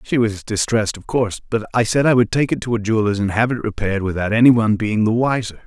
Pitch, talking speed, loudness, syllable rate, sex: 110 Hz, 265 wpm, -18 LUFS, 6.7 syllables/s, male